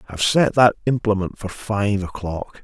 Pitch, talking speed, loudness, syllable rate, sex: 105 Hz, 160 wpm, -20 LUFS, 4.7 syllables/s, male